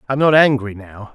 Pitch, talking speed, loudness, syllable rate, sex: 125 Hz, 260 wpm, -14 LUFS, 6.2 syllables/s, male